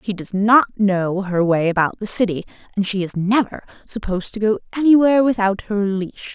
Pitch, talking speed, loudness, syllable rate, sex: 205 Hz, 190 wpm, -18 LUFS, 5.3 syllables/s, female